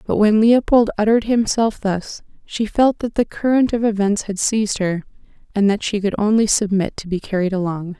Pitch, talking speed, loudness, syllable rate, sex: 210 Hz, 195 wpm, -18 LUFS, 5.2 syllables/s, female